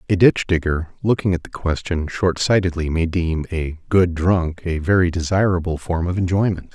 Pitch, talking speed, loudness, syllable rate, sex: 85 Hz, 180 wpm, -20 LUFS, 4.9 syllables/s, male